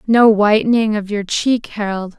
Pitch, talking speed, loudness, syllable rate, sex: 210 Hz, 165 wpm, -15 LUFS, 4.4 syllables/s, female